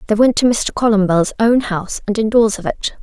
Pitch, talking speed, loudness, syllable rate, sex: 220 Hz, 220 wpm, -15 LUFS, 5.6 syllables/s, female